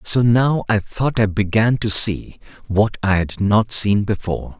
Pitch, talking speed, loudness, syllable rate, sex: 105 Hz, 185 wpm, -17 LUFS, 4.1 syllables/s, male